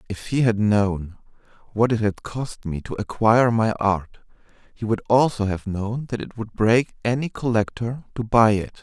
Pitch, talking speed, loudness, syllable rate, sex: 110 Hz, 185 wpm, -22 LUFS, 4.6 syllables/s, male